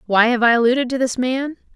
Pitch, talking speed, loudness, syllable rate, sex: 250 Hz, 240 wpm, -17 LUFS, 6.2 syllables/s, female